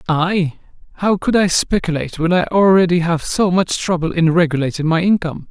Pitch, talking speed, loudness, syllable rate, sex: 170 Hz, 165 wpm, -16 LUFS, 5.5 syllables/s, male